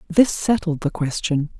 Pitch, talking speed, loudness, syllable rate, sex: 170 Hz, 150 wpm, -21 LUFS, 4.4 syllables/s, female